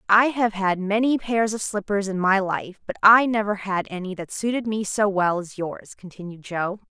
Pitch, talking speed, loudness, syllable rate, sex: 200 Hz, 210 wpm, -22 LUFS, 4.8 syllables/s, female